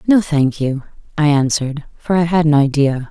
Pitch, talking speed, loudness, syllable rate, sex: 150 Hz, 195 wpm, -16 LUFS, 5.1 syllables/s, female